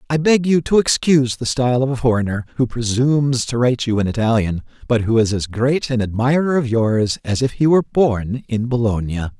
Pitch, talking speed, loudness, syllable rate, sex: 125 Hz, 210 wpm, -18 LUFS, 5.6 syllables/s, male